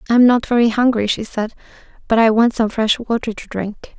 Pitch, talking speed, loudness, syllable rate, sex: 225 Hz, 210 wpm, -17 LUFS, 5.2 syllables/s, female